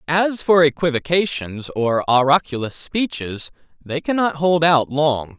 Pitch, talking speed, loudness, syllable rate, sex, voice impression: 150 Hz, 125 wpm, -19 LUFS, 4.0 syllables/s, male, masculine, adult-like, slightly refreshing, sincere, lively